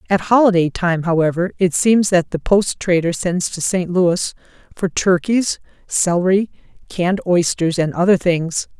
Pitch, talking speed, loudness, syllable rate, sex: 180 Hz, 150 wpm, -17 LUFS, 4.5 syllables/s, female